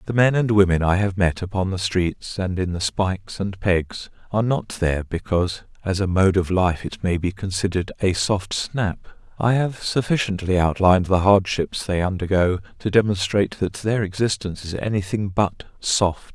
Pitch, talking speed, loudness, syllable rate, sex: 95 Hz, 180 wpm, -21 LUFS, 5.0 syllables/s, male